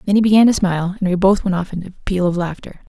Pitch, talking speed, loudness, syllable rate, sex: 190 Hz, 305 wpm, -17 LUFS, 7.5 syllables/s, female